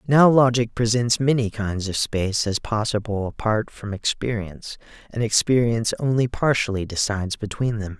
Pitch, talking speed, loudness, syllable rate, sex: 110 Hz, 145 wpm, -22 LUFS, 5.1 syllables/s, male